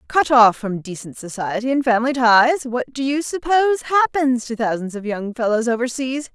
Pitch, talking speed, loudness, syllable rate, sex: 250 Hz, 180 wpm, -18 LUFS, 5.3 syllables/s, female